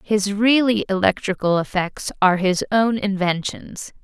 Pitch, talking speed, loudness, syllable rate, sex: 200 Hz, 120 wpm, -19 LUFS, 4.4 syllables/s, female